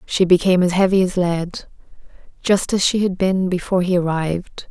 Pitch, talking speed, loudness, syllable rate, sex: 180 Hz, 165 wpm, -18 LUFS, 5.5 syllables/s, female